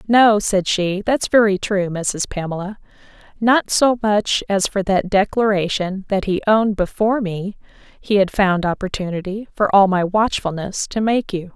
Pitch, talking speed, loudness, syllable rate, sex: 200 Hz, 160 wpm, -18 LUFS, 4.6 syllables/s, female